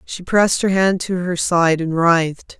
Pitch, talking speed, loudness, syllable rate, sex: 175 Hz, 210 wpm, -17 LUFS, 4.5 syllables/s, female